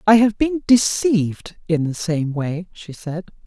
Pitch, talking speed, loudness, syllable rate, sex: 185 Hz, 175 wpm, -19 LUFS, 4.0 syllables/s, female